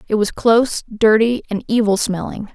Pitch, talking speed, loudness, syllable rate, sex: 215 Hz, 165 wpm, -17 LUFS, 4.9 syllables/s, female